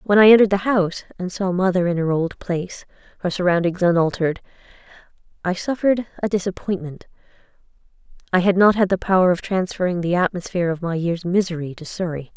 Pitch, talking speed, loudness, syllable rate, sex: 180 Hz, 170 wpm, -20 LUFS, 6.3 syllables/s, female